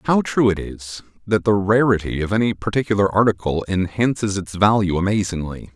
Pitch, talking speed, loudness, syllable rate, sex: 100 Hz, 155 wpm, -19 LUFS, 5.4 syllables/s, male